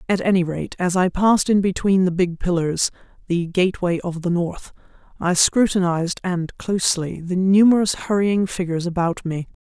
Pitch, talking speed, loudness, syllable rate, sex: 180 Hz, 160 wpm, -20 LUFS, 5.1 syllables/s, female